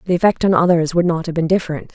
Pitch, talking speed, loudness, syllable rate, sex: 170 Hz, 275 wpm, -16 LUFS, 7.3 syllables/s, female